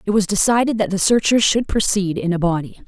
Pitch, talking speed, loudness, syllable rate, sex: 195 Hz, 230 wpm, -17 LUFS, 5.9 syllables/s, female